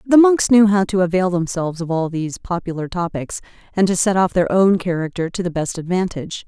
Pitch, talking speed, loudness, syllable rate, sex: 180 Hz, 215 wpm, -18 LUFS, 5.8 syllables/s, female